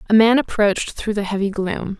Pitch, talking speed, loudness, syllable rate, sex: 210 Hz, 210 wpm, -19 LUFS, 5.5 syllables/s, female